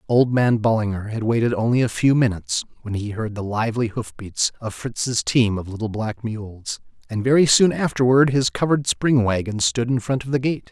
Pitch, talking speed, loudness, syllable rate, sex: 115 Hz, 200 wpm, -21 LUFS, 5.2 syllables/s, male